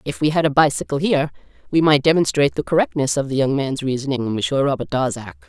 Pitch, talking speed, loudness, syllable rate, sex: 140 Hz, 210 wpm, -19 LUFS, 6.4 syllables/s, female